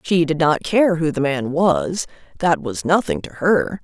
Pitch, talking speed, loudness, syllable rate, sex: 165 Hz, 205 wpm, -19 LUFS, 4.1 syllables/s, female